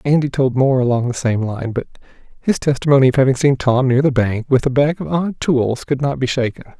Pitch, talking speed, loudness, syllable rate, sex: 130 Hz, 240 wpm, -17 LUFS, 5.6 syllables/s, male